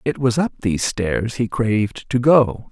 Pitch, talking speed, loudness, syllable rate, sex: 120 Hz, 200 wpm, -19 LUFS, 4.5 syllables/s, male